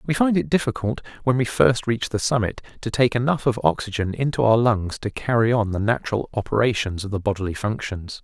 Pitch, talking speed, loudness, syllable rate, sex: 115 Hz, 205 wpm, -22 LUFS, 5.8 syllables/s, male